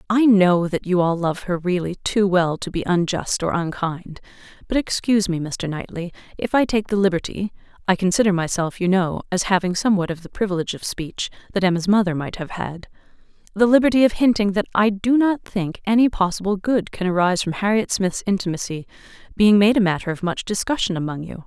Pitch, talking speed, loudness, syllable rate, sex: 190 Hz, 200 wpm, -20 LUFS, 5.3 syllables/s, female